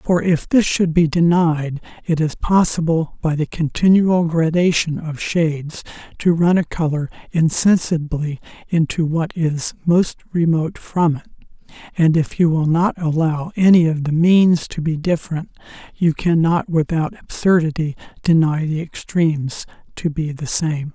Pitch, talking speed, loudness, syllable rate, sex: 165 Hz, 145 wpm, -18 LUFS, 4.4 syllables/s, male